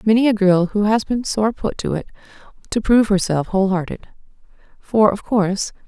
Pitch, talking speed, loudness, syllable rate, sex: 205 Hz, 185 wpm, -18 LUFS, 5.6 syllables/s, female